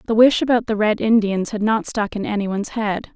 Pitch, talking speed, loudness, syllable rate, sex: 215 Hz, 230 wpm, -19 LUFS, 5.4 syllables/s, female